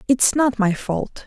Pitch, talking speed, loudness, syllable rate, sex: 235 Hz, 190 wpm, -19 LUFS, 3.7 syllables/s, female